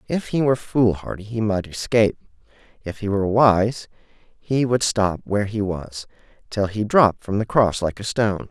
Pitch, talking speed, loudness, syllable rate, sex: 105 Hz, 185 wpm, -21 LUFS, 4.9 syllables/s, male